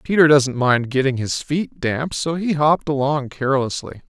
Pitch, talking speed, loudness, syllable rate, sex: 140 Hz, 175 wpm, -19 LUFS, 4.8 syllables/s, male